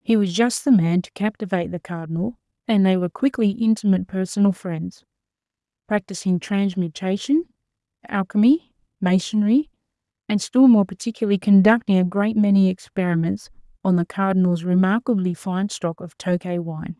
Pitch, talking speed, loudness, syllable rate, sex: 195 Hz, 135 wpm, -21 LUFS, 5.3 syllables/s, female